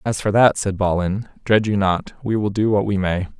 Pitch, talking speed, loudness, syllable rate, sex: 100 Hz, 250 wpm, -19 LUFS, 5.0 syllables/s, male